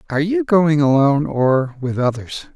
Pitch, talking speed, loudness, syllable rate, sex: 150 Hz, 165 wpm, -17 LUFS, 4.8 syllables/s, male